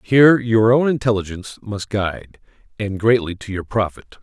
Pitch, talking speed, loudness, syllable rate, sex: 110 Hz, 140 wpm, -18 LUFS, 5.2 syllables/s, male